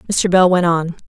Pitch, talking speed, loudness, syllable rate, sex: 175 Hz, 220 wpm, -15 LUFS, 5.3 syllables/s, female